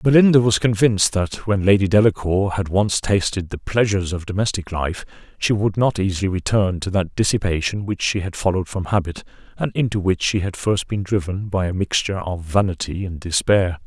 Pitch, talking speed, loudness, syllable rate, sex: 95 Hz, 190 wpm, -20 LUFS, 5.5 syllables/s, male